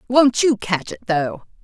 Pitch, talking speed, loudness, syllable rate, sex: 195 Hz, 185 wpm, -19 LUFS, 4.1 syllables/s, female